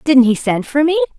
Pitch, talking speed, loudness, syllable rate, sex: 275 Hz, 250 wpm, -15 LUFS, 5.6 syllables/s, female